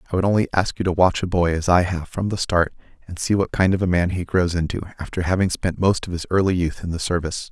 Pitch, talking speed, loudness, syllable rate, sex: 90 Hz, 285 wpm, -21 LUFS, 6.5 syllables/s, male